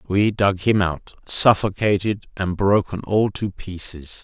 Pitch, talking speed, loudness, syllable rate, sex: 100 Hz, 140 wpm, -20 LUFS, 3.8 syllables/s, male